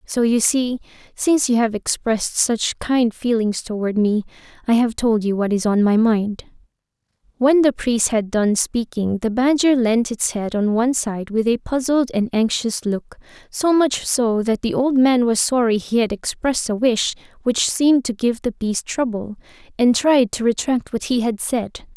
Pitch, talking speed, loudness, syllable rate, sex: 235 Hz, 190 wpm, -19 LUFS, 4.5 syllables/s, female